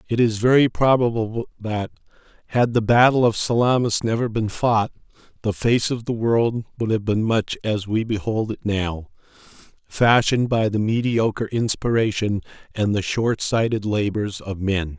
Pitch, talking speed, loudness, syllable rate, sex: 110 Hz, 155 wpm, -21 LUFS, 4.7 syllables/s, male